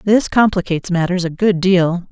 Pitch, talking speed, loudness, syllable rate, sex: 185 Hz, 170 wpm, -16 LUFS, 5.1 syllables/s, female